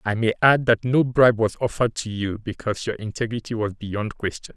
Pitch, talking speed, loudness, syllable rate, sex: 110 Hz, 210 wpm, -22 LUFS, 5.8 syllables/s, male